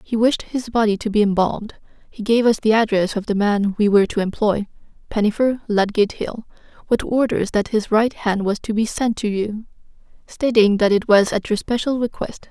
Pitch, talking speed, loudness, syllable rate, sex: 215 Hz, 195 wpm, -19 LUFS, 5.0 syllables/s, female